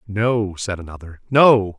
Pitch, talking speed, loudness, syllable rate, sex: 105 Hz, 100 wpm, -17 LUFS, 3.8 syllables/s, male